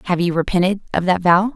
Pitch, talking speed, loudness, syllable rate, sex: 185 Hz, 230 wpm, -17 LUFS, 6.5 syllables/s, female